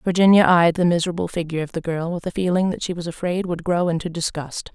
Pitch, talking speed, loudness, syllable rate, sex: 175 Hz, 240 wpm, -21 LUFS, 6.5 syllables/s, female